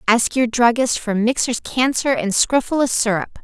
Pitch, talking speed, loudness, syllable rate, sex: 240 Hz, 155 wpm, -18 LUFS, 4.6 syllables/s, female